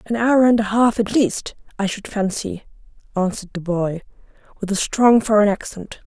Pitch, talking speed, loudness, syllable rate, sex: 210 Hz, 175 wpm, -19 LUFS, 5.0 syllables/s, female